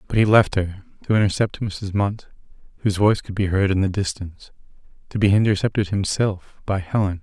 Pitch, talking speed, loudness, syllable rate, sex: 100 Hz, 185 wpm, -21 LUFS, 5.8 syllables/s, male